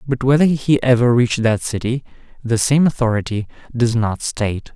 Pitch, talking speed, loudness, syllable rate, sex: 120 Hz, 165 wpm, -17 LUFS, 5.3 syllables/s, male